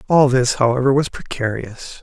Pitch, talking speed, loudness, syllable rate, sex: 130 Hz, 150 wpm, -18 LUFS, 4.9 syllables/s, male